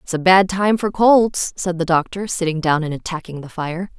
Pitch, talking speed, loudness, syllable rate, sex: 180 Hz, 225 wpm, -18 LUFS, 5.0 syllables/s, female